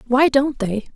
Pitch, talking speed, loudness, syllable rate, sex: 255 Hz, 190 wpm, -18 LUFS, 4.4 syllables/s, female